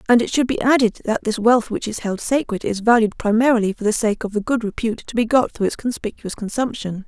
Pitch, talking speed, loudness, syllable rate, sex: 225 Hz, 245 wpm, -19 LUFS, 6.0 syllables/s, female